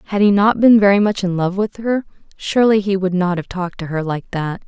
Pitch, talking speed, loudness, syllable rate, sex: 195 Hz, 255 wpm, -17 LUFS, 5.8 syllables/s, female